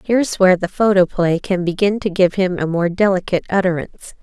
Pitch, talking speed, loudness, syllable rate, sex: 185 Hz, 200 wpm, -17 LUFS, 6.2 syllables/s, female